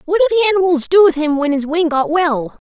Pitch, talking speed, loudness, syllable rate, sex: 325 Hz, 270 wpm, -14 LUFS, 6.1 syllables/s, female